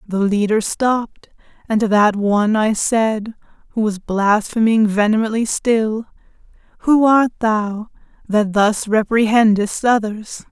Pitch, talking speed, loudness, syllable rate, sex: 215 Hz, 120 wpm, -17 LUFS, 4.0 syllables/s, female